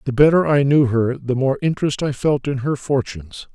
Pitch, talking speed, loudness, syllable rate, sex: 135 Hz, 220 wpm, -18 LUFS, 5.4 syllables/s, male